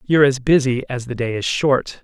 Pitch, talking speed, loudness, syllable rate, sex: 130 Hz, 235 wpm, -18 LUFS, 5.4 syllables/s, male